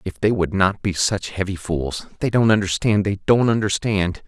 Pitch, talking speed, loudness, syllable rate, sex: 100 Hz, 195 wpm, -20 LUFS, 4.7 syllables/s, male